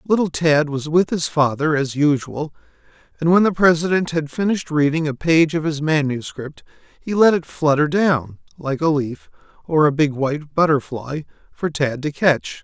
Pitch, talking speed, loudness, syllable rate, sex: 155 Hz, 175 wpm, -19 LUFS, 4.8 syllables/s, male